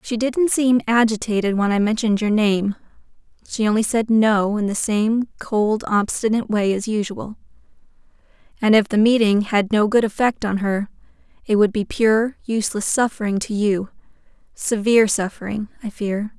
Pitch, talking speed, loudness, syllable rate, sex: 215 Hz, 155 wpm, -19 LUFS, 4.9 syllables/s, female